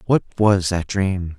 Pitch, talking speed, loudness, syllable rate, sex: 95 Hz, 175 wpm, -20 LUFS, 3.7 syllables/s, male